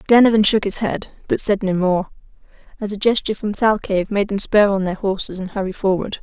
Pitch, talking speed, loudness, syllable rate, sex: 200 Hz, 210 wpm, -18 LUFS, 5.9 syllables/s, female